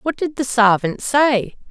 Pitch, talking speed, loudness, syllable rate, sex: 240 Hz, 175 wpm, -17 LUFS, 3.9 syllables/s, female